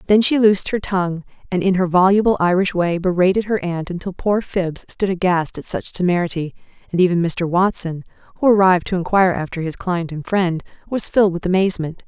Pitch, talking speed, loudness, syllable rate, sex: 185 Hz, 195 wpm, -18 LUFS, 6.0 syllables/s, female